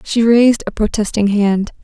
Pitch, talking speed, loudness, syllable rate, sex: 215 Hz, 165 wpm, -14 LUFS, 4.9 syllables/s, female